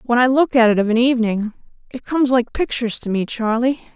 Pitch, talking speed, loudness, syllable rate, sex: 240 Hz, 225 wpm, -18 LUFS, 6.1 syllables/s, female